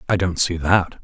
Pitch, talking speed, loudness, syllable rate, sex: 90 Hz, 235 wpm, -19 LUFS, 4.8 syllables/s, male